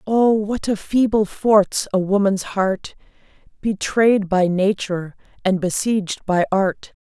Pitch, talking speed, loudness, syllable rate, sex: 200 Hz, 130 wpm, -19 LUFS, 3.8 syllables/s, female